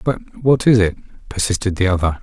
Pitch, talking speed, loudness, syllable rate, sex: 105 Hz, 190 wpm, -17 LUFS, 6.1 syllables/s, male